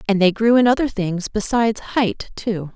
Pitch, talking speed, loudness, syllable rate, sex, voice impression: 210 Hz, 195 wpm, -19 LUFS, 4.7 syllables/s, female, very feminine, slightly adult-like, slightly middle-aged, thin, slightly tensed, slightly powerful, bright, slightly soft, clear, fluent, slightly cute, slightly cool, very intellectual, refreshing, very sincere, very calm, friendly, reassuring, slightly unique, very elegant, slightly sweet, slightly lively, kind